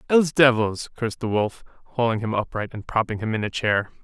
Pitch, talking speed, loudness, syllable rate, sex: 115 Hz, 210 wpm, -23 LUFS, 5.7 syllables/s, male